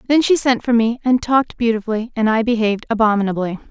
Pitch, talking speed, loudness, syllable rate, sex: 230 Hz, 195 wpm, -17 LUFS, 6.6 syllables/s, female